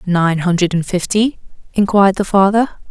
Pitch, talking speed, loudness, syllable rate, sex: 195 Hz, 145 wpm, -15 LUFS, 5.3 syllables/s, female